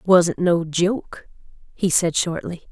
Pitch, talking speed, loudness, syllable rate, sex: 175 Hz, 135 wpm, -20 LUFS, 3.5 syllables/s, female